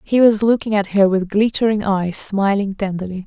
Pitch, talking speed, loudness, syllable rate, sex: 200 Hz, 185 wpm, -17 LUFS, 5.1 syllables/s, female